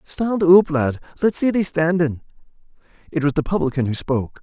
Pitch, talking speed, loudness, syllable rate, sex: 160 Hz, 175 wpm, -19 LUFS, 5.3 syllables/s, male